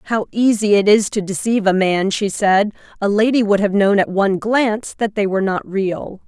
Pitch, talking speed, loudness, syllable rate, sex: 205 Hz, 220 wpm, -17 LUFS, 5.3 syllables/s, female